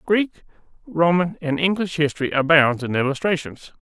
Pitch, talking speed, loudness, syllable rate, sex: 160 Hz, 125 wpm, -20 LUFS, 5.0 syllables/s, male